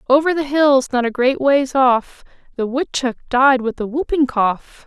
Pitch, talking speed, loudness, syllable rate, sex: 265 Hz, 185 wpm, -17 LUFS, 4.3 syllables/s, female